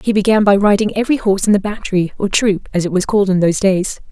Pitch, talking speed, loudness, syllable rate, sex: 200 Hz, 260 wpm, -15 LUFS, 7.0 syllables/s, female